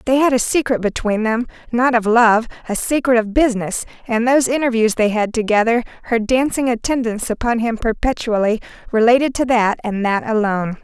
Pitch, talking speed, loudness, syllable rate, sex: 230 Hz, 160 wpm, -17 LUFS, 5.7 syllables/s, female